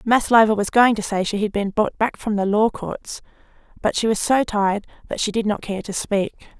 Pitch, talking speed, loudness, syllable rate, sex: 210 Hz, 235 wpm, -20 LUFS, 5.2 syllables/s, female